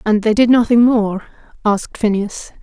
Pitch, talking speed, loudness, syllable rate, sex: 220 Hz, 160 wpm, -15 LUFS, 4.9 syllables/s, female